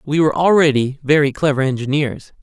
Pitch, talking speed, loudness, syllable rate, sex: 145 Hz, 150 wpm, -16 LUFS, 5.9 syllables/s, male